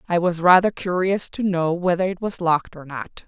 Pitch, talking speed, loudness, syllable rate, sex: 180 Hz, 220 wpm, -20 LUFS, 5.2 syllables/s, female